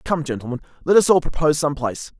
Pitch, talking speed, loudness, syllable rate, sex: 150 Hz, 220 wpm, -19 LUFS, 7.3 syllables/s, male